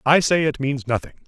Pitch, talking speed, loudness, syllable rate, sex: 140 Hz, 235 wpm, -21 LUFS, 5.7 syllables/s, male